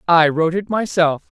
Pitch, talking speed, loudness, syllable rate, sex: 175 Hz, 170 wpm, -17 LUFS, 5.5 syllables/s, female